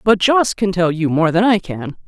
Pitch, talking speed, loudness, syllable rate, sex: 185 Hz, 260 wpm, -15 LUFS, 4.8 syllables/s, female